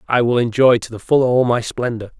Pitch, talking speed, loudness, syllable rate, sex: 120 Hz, 245 wpm, -16 LUFS, 5.6 syllables/s, male